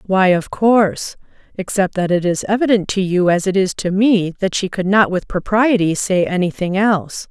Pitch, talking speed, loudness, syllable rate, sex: 190 Hz, 190 wpm, -16 LUFS, 5.0 syllables/s, female